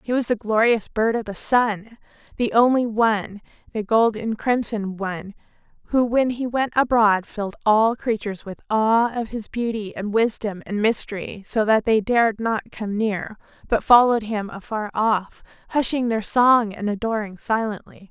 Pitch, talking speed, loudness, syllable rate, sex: 220 Hz, 170 wpm, -21 LUFS, 4.6 syllables/s, female